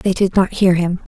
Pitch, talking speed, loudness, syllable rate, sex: 185 Hz, 260 wpm, -16 LUFS, 5.0 syllables/s, female